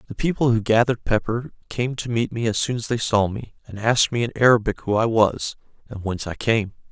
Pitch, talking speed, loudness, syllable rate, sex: 115 Hz, 235 wpm, -21 LUFS, 6.0 syllables/s, male